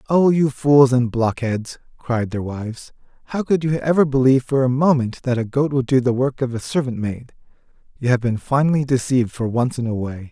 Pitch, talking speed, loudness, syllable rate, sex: 130 Hz, 215 wpm, -19 LUFS, 5.4 syllables/s, male